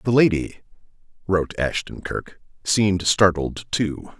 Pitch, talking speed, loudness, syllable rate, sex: 100 Hz, 115 wpm, -22 LUFS, 4.2 syllables/s, male